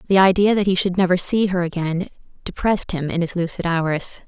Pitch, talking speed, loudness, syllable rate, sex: 180 Hz, 210 wpm, -20 LUFS, 5.7 syllables/s, female